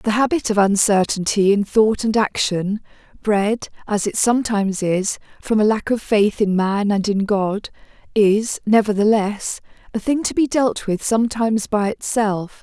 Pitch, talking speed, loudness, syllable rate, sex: 210 Hz, 160 wpm, -19 LUFS, 4.5 syllables/s, female